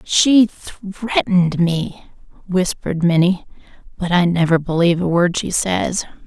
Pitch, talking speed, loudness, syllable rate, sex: 180 Hz, 125 wpm, -17 LUFS, 4.2 syllables/s, female